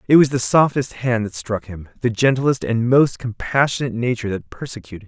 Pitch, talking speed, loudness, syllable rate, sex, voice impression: 120 Hz, 200 wpm, -19 LUFS, 5.8 syllables/s, male, very masculine, very adult-like, intellectual, slightly mature, slightly wild